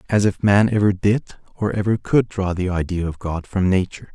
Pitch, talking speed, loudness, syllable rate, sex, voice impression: 100 Hz, 215 wpm, -20 LUFS, 5.3 syllables/s, male, very masculine, very adult-like, old, very thick, slightly relaxed, weak, slightly dark, very soft, muffled, fluent, slightly raspy, very cool, very intellectual, sincere, very calm, very mature, very friendly, very reassuring, unique, elegant, very wild, slightly sweet, very kind, very modest